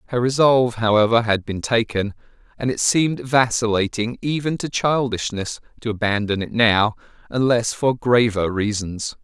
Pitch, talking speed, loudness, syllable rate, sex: 115 Hz, 135 wpm, -20 LUFS, 4.8 syllables/s, male